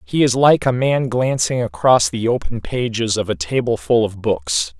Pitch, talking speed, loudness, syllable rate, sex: 110 Hz, 190 wpm, -18 LUFS, 4.5 syllables/s, male